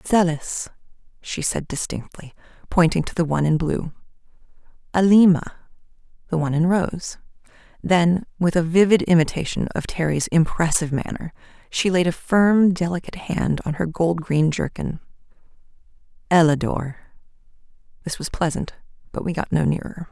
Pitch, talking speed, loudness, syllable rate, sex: 165 Hz, 125 wpm, -21 LUFS, 5.0 syllables/s, female